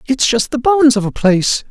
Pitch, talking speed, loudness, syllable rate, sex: 245 Hz, 245 wpm, -13 LUFS, 5.9 syllables/s, male